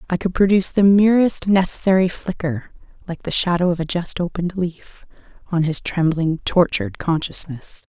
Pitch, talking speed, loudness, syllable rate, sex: 175 Hz, 150 wpm, -19 LUFS, 5.1 syllables/s, female